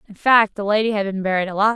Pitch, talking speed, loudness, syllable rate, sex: 205 Hz, 275 wpm, -18 LUFS, 7.4 syllables/s, female